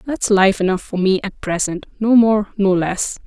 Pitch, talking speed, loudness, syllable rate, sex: 200 Hz, 185 wpm, -17 LUFS, 4.6 syllables/s, female